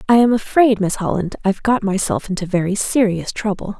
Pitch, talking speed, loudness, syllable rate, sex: 205 Hz, 190 wpm, -18 LUFS, 5.7 syllables/s, female